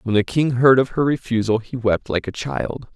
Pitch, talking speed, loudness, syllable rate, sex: 120 Hz, 245 wpm, -19 LUFS, 5.0 syllables/s, male